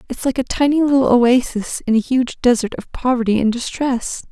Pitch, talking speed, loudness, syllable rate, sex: 245 Hz, 195 wpm, -17 LUFS, 5.2 syllables/s, female